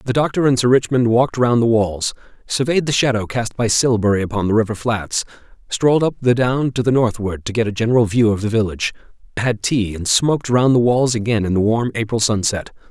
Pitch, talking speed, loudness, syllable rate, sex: 115 Hz, 220 wpm, -17 LUFS, 5.8 syllables/s, male